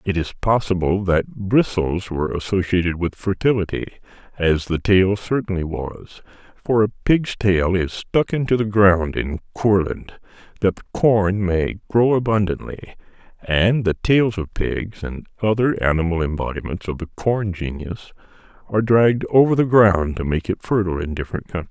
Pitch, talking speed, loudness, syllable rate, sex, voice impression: 95 Hz, 155 wpm, -20 LUFS, 4.8 syllables/s, male, masculine, slightly old, thick, tensed, powerful, hard, slightly muffled, calm, mature, wild, slightly lively, strict